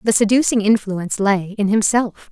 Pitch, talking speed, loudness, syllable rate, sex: 210 Hz, 155 wpm, -17 LUFS, 5.0 syllables/s, female